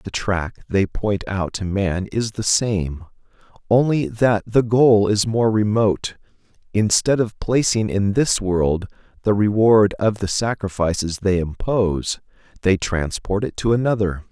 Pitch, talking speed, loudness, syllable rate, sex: 100 Hz, 145 wpm, -19 LUFS, 4.1 syllables/s, male